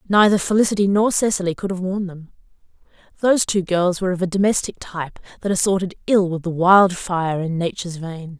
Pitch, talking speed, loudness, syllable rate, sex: 185 Hz, 180 wpm, -19 LUFS, 6.0 syllables/s, female